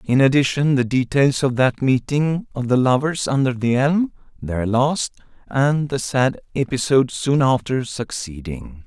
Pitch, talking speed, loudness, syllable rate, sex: 130 Hz, 135 wpm, -19 LUFS, 4.2 syllables/s, male